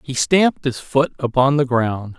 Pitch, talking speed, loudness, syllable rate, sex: 135 Hz, 190 wpm, -18 LUFS, 4.5 syllables/s, male